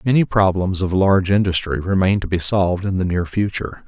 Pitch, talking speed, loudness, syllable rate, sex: 95 Hz, 200 wpm, -18 LUFS, 5.9 syllables/s, male